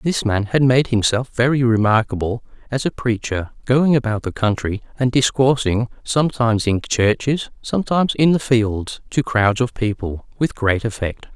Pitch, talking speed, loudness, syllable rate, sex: 120 Hz, 160 wpm, -19 LUFS, 4.9 syllables/s, male